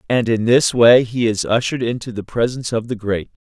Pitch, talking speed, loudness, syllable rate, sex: 115 Hz, 225 wpm, -17 LUFS, 5.7 syllables/s, male